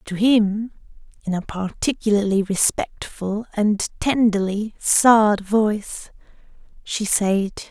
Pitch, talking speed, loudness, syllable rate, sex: 210 Hz, 95 wpm, -20 LUFS, 3.5 syllables/s, female